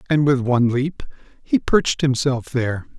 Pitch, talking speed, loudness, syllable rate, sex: 135 Hz, 160 wpm, -20 LUFS, 5.2 syllables/s, male